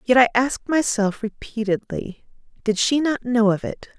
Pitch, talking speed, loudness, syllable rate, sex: 230 Hz, 165 wpm, -21 LUFS, 4.8 syllables/s, female